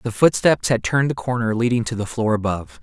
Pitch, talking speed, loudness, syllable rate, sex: 115 Hz, 235 wpm, -20 LUFS, 6.2 syllables/s, male